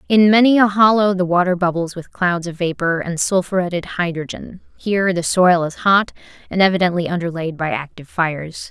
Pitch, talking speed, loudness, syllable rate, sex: 180 Hz, 170 wpm, -17 LUFS, 5.5 syllables/s, female